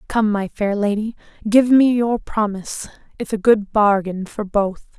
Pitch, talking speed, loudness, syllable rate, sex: 210 Hz, 170 wpm, -18 LUFS, 4.4 syllables/s, female